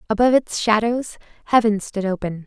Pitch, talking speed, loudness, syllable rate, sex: 215 Hz, 145 wpm, -19 LUFS, 5.7 syllables/s, female